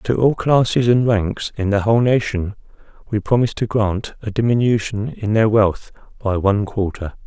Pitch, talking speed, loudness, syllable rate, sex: 110 Hz, 175 wpm, -18 LUFS, 5.0 syllables/s, male